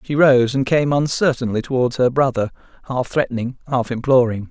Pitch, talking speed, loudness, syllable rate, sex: 130 Hz, 160 wpm, -18 LUFS, 5.4 syllables/s, male